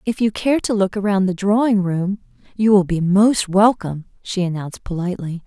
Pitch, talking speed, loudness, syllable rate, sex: 195 Hz, 185 wpm, -18 LUFS, 5.3 syllables/s, female